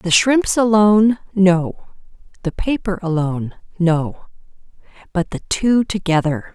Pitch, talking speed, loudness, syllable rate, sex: 190 Hz, 120 wpm, -17 LUFS, 4.0 syllables/s, female